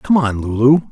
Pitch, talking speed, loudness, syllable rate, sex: 130 Hz, 195 wpm, -15 LUFS, 4.9 syllables/s, male